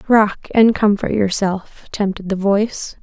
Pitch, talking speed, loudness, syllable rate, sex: 205 Hz, 140 wpm, -17 LUFS, 4.6 syllables/s, female